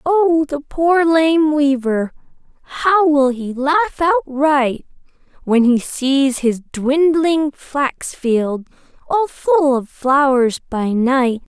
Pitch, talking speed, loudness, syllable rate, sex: 285 Hz, 120 wpm, -16 LUFS, 2.9 syllables/s, female